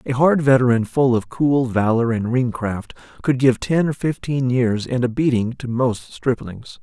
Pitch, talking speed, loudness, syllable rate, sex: 125 Hz, 195 wpm, -19 LUFS, 4.4 syllables/s, male